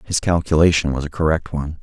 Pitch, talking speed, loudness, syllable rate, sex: 80 Hz, 195 wpm, -18 LUFS, 6.4 syllables/s, male